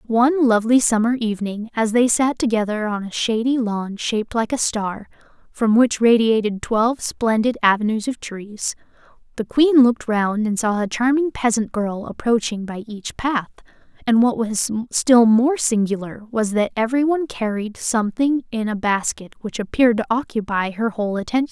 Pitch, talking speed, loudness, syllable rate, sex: 225 Hz, 165 wpm, -19 LUFS, 5.3 syllables/s, female